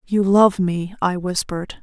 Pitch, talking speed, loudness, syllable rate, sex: 190 Hz, 165 wpm, -19 LUFS, 4.3 syllables/s, female